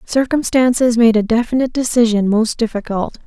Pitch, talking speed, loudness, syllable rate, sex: 235 Hz, 130 wpm, -15 LUFS, 5.5 syllables/s, female